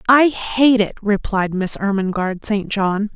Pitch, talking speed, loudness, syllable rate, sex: 210 Hz, 150 wpm, -18 LUFS, 4.1 syllables/s, female